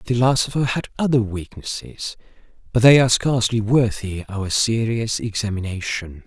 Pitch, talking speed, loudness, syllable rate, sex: 115 Hz, 115 wpm, -20 LUFS, 5.2 syllables/s, male